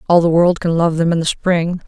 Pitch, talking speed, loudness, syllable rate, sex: 170 Hz, 290 wpm, -15 LUFS, 5.4 syllables/s, female